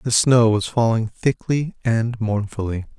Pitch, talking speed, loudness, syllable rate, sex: 115 Hz, 140 wpm, -20 LUFS, 4.1 syllables/s, male